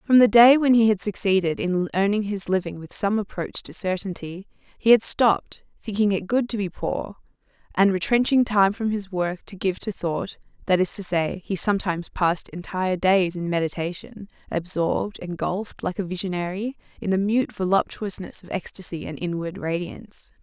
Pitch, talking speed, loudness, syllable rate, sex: 195 Hz, 175 wpm, -23 LUFS, 5.1 syllables/s, female